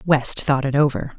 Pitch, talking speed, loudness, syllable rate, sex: 140 Hz, 205 wpm, -19 LUFS, 4.8 syllables/s, female